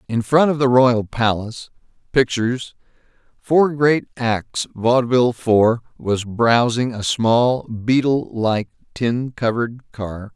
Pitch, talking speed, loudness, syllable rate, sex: 120 Hz, 120 wpm, -18 LUFS, 3.8 syllables/s, male